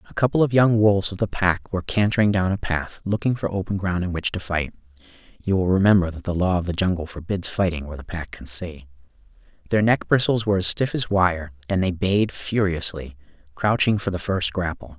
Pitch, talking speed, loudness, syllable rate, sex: 95 Hz, 215 wpm, -22 LUFS, 4.3 syllables/s, male